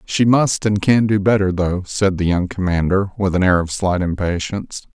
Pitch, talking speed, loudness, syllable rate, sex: 95 Hz, 205 wpm, -17 LUFS, 4.9 syllables/s, male